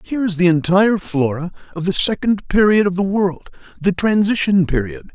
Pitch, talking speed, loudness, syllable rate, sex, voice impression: 185 Hz, 165 wpm, -17 LUFS, 5.4 syllables/s, male, very masculine, old, very thick, slightly tensed, slightly powerful, slightly dark, soft, muffled, fluent, raspy, cool, intellectual, slightly refreshing, sincere, calm, friendly, reassuring, very unique, slightly elegant, very wild, lively, slightly strict, intense